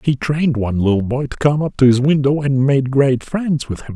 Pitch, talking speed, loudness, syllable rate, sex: 135 Hz, 260 wpm, -16 LUFS, 5.5 syllables/s, male